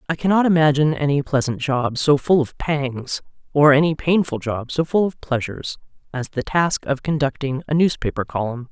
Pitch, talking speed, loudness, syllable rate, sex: 145 Hz, 185 wpm, -20 LUFS, 5.2 syllables/s, female